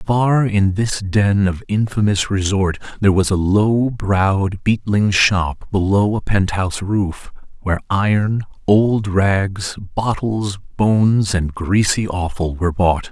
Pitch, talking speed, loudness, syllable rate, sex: 100 Hz, 135 wpm, -17 LUFS, 3.9 syllables/s, male